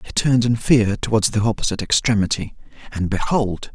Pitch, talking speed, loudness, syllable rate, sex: 110 Hz, 145 wpm, -19 LUFS, 5.9 syllables/s, male